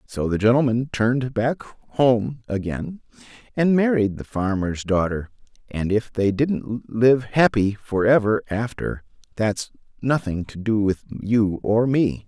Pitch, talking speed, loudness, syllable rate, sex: 115 Hz, 140 wpm, -22 LUFS, 3.9 syllables/s, male